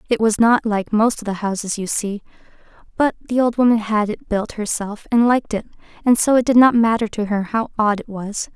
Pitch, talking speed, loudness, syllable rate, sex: 220 Hz, 230 wpm, -18 LUFS, 5.5 syllables/s, female